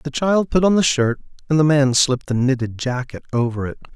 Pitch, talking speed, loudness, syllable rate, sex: 140 Hz, 230 wpm, -18 LUFS, 5.6 syllables/s, male